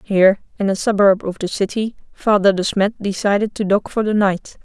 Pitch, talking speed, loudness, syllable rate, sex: 200 Hz, 205 wpm, -18 LUFS, 5.4 syllables/s, female